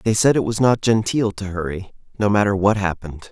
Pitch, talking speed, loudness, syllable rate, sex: 100 Hz, 215 wpm, -19 LUFS, 5.8 syllables/s, male